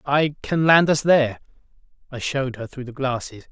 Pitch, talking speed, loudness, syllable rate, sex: 135 Hz, 190 wpm, -21 LUFS, 5.3 syllables/s, male